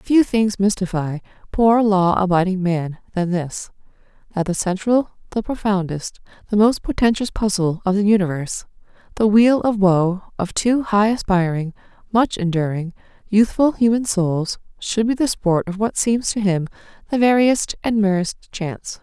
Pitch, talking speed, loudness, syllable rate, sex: 200 Hz, 150 wpm, -19 LUFS, 4.5 syllables/s, female